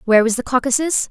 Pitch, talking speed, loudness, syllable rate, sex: 255 Hz, 220 wpm, -17 LUFS, 7.1 syllables/s, female